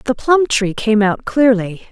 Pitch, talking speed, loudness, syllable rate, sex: 230 Hz, 190 wpm, -15 LUFS, 3.8 syllables/s, female